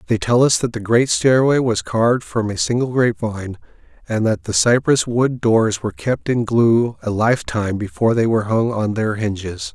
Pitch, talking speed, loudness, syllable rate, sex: 115 Hz, 195 wpm, -18 LUFS, 5.2 syllables/s, male